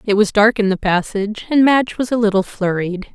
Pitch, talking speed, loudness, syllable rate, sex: 210 Hz, 230 wpm, -16 LUFS, 5.8 syllables/s, female